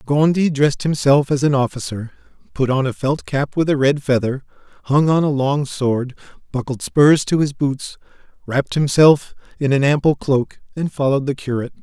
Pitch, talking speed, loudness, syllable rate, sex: 140 Hz, 180 wpm, -18 LUFS, 5.2 syllables/s, male